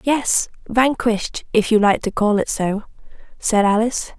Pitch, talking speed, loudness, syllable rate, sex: 220 Hz, 160 wpm, -19 LUFS, 4.6 syllables/s, female